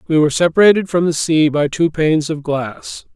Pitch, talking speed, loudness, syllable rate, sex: 160 Hz, 210 wpm, -15 LUFS, 5.5 syllables/s, male